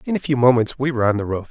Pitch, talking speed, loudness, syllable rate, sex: 125 Hz, 360 wpm, -19 LUFS, 7.8 syllables/s, male